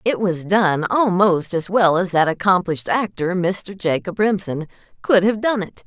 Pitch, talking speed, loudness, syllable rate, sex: 190 Hz, 175 wpm, -19 LUFS, 4.4 syllables/s, female